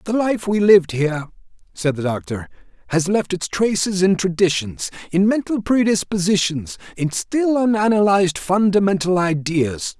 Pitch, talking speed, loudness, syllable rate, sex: 185 Hz, 130 wpm, -19 LUFS, 4.8 syllables/s, male